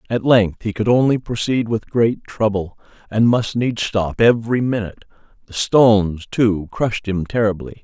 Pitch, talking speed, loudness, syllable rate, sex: 110 Hz, 160 wpm, -18 LUFS, 4.8 syllables/s, male